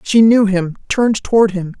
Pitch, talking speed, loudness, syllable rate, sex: 205 Hz, 200 wpm, -14 LUFS, 5.2 syllables/s, female